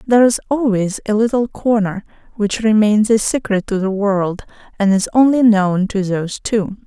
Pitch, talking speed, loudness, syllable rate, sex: 215 Hz, 165 wpm, -16 LUFS, 4.7 syllables/s, female